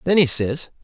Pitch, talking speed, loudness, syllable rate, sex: 145 Hz, 215 wpm, -18 LUFS, 4.8 syllables/s, male